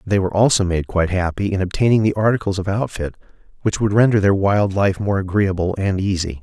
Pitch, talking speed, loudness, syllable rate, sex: 100 Hz, 205 wpm, -18 LUFS, 6.0 syllables/s, male